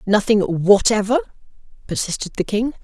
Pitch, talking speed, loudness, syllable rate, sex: 215 Hz, 105 wpm, -18 LUFS, 4.8 syllables/s, male